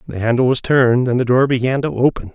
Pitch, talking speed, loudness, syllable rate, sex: 125 Hz, 255 wpm, -16 LUFS, 6.3 syllables/s, male